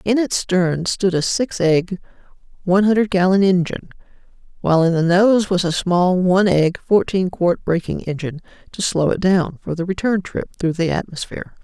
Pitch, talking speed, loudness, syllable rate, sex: 175 Hz, 180 wpm, -18 LUFS, 5.2 syllables/s, female